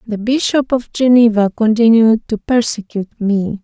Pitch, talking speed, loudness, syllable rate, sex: 225 Hz, 130 wpm, -14 LUFS, 4.7 syllables/s, female